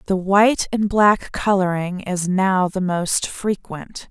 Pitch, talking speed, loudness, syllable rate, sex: 190 Hz, 145 wpm, -19 LUFS, 3.6 syllables/s, female